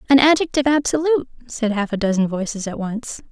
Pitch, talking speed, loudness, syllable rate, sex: 245 Hz, 180 wpm, -19 LUFS, 6.3 syllables/s, female